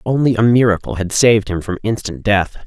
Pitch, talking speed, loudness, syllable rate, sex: 105 Hz, 205 wpm, -15 LUFS, 5.6 syllables/s, male